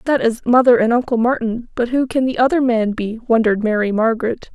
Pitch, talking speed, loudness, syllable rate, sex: 235 Hz, 210 wpm, -17 LUFS, 5.9 syllables/s, female